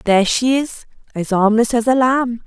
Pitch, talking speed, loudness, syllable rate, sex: 235 Hz, 195 wpm, -16 LUFS, 4.6 syllables/s, female